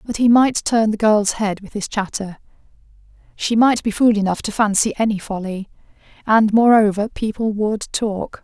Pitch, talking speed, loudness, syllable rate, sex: 215 Hz, 170 wpm, -18 LUFS, 4.7 syllables/s, female